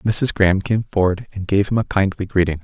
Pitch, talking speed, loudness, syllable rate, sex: 100 Hz, 230 wpm, -19 LUFS, 5.6 syllables/s, male